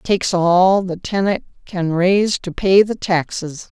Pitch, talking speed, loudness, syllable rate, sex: 185 Hz, 160 wpm, -17 LUFS, 4.0 syllables/s, female